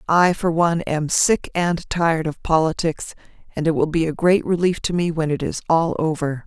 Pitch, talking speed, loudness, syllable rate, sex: 160 Hz, 215 wpm, -20 LUFS, 5.0 syllables/s, female